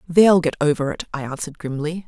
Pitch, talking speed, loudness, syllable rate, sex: 160 Hz, 205 wpm, -20 LUFS, 6.2 syllables/s, female